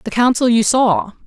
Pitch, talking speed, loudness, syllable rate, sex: 235 Hz, 190 wpm, -15 LUFS, 4.6 syllables/s, female